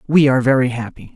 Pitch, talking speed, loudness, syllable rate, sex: 130 Hz, 210 wpm, -15 LUFS, 7.1 syllables/s, male